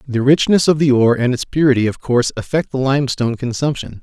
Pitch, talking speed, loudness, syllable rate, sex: 135 Hz, 210 wpm, -16 LUFS, 6.5 syllables/s, male